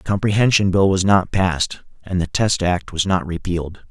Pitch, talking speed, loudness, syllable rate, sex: 95 Hz, 200 wpm, -19 LUFS, 5.2 syllables/s, male